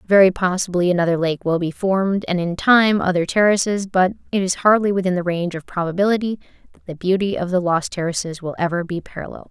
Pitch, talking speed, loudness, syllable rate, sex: 185 Hz, 200 wpm, -19 LUFS, 6.2 syllables/s, female